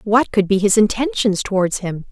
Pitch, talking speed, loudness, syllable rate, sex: 210 Hz, 200 wpm, -17 LUFS, 5.1 syllables/s, female